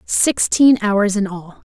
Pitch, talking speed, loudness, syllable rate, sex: 205 Hz, 140 wpm, -16 LUFS, 3.3 syllables/s, female